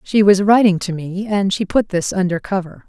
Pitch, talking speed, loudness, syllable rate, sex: 190 Hz, 230 wpm, -17 LUFS, 5.1 syllables/s, female